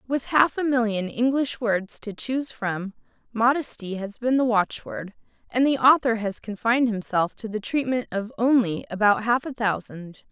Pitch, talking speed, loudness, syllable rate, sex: 230 Hz, 170 wpm, -24 LUFS, 4.6 syllables/s, female